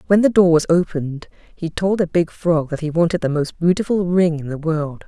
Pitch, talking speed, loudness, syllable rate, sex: 170 Hz, 235 wpm, -18 LUFS, 5.3 syllables/s, female